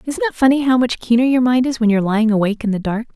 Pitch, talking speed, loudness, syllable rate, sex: 240 Hz, 325 wpm, -16 LUFS, 7.7 syllables/s, female